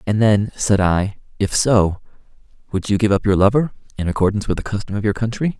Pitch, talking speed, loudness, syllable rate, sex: 105 Hz, 215 wpm, -18 LUFS, 6.1 syllables/s, male